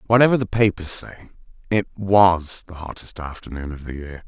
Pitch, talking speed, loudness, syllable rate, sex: 90 Hz, 170 wpm, -20 LUFS, 5.0 syllables/s, male